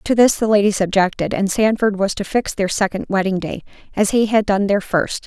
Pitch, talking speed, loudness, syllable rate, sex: 200 Hz, 230 wpm, -18 LUFS, 5.3 syllables/s, female